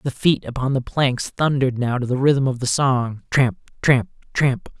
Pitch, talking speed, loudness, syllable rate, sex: 130 Hz, 200 wpm, -20 LUFS, 4.4 syllables/s, male